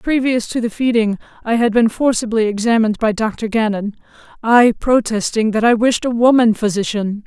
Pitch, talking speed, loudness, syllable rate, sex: 225 Hz, 165 wpm, -16 LUFS, 5.1 syllables/s, female